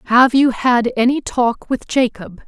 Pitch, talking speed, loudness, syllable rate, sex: 245 Hz, 170 wpm, -16 LUFS, 4.0 syllables/s, female